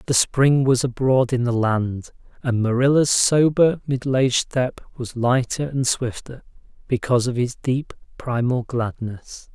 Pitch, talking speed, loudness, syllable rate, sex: 125 Hz, 145 wpm, -20 LUFS, 4.3 syllables/s, male